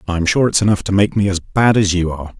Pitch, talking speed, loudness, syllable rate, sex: 95 Hz, 300 wpm, -15 LUFS, 6.3 syllables/s, male